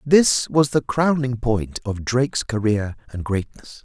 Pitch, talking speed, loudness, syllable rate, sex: 120 Hz, 155 wpm, -21 LUFS, 3.9 syllables/s, male